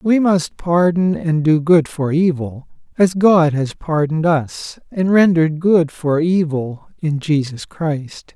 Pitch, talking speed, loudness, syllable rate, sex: 165 Hz, 150 wpm, -16 LUFS, 3.7 syllables/s, male